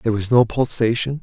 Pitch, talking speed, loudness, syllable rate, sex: 120 Hz, 195 wpm, -18 LUFS, 5.9 syllables/s, male